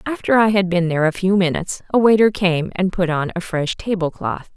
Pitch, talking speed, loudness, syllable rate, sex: 185 Hz, 235 wpm, -18 LUFS, 5.6 syllables/s, female